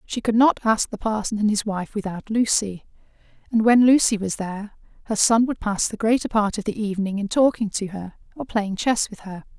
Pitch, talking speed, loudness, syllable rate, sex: 215 Hz, 220 wpm, -21 LUFS, 5.4 syllables/s, female